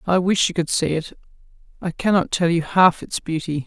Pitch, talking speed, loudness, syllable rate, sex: 170 Hz, 215 wpm, -20 LUFS, 5.1 syllables/s, female